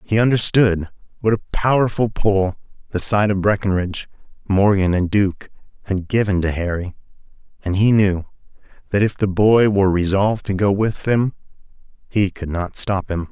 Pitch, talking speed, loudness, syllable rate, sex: 100 Hz, 160 wpm, -18 LUFS, 4.9 syllables/s, male